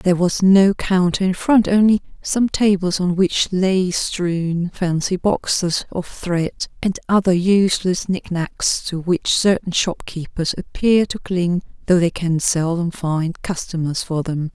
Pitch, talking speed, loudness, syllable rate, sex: 180 Hz, 155 wpm, -19 LUFS, 3.9 syllables/s, female